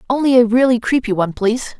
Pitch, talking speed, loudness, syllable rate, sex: 235 Hz, 200 wpm, -15 LUFS, 6.8 syllables/s, female